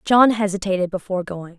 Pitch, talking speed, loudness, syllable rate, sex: 195 Hz, 150 wpm, -20 LUFS, 6.0 syllables/s, female